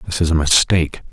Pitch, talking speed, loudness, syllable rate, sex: 80 Hz, 215 wpm, -16 LUFS, 5.9 syllables/s, male